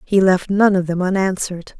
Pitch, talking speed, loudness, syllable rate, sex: 185 Hz, 200 wpm, -17 LUFS, 5.3 syllables/s, female